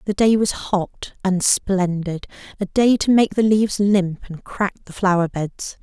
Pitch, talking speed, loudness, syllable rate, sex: 190 Hz, 185 wpm, -19 LUFS, 4.2 syllables/s, female